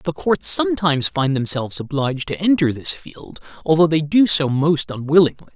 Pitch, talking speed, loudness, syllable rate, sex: 160 Hz, 175 wpm, -18 LUFS, 5.5 syllables/s, male